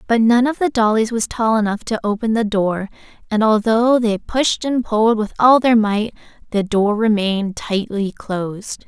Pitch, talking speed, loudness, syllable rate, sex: 220 Hz, 185 wpm, -17 LUFS, 4.6 syllables/s, female